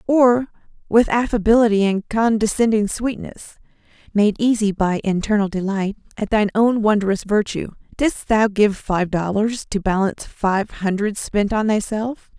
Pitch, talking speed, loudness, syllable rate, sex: 210 Hz, 135 wpm, -19 LUFS, 4.5 syllables/s, female